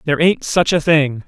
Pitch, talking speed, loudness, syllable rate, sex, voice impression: 150 Hz, 235 wpm, -15 LUFS, 5.3 syllables/s, male, very masculine, very adult-like, thick, slightly tensed, slightly powerful, bright, soft, clear, fluent, cool, intellectual, very refreshing, sincere, calm, slightly mature, friendly, reassuring, slightly unique, slightly elegant, wild, slightly sweet, lively, kind, slightly modest